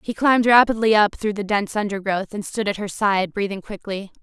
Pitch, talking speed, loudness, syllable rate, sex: 205 Hz, 215 wpm, -20 LUFS, 5.8 syllables/s, female